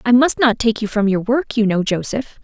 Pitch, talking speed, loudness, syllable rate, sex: 230 Hz, 270 wpm, -17 LUFS, 5.2 syllables/s, female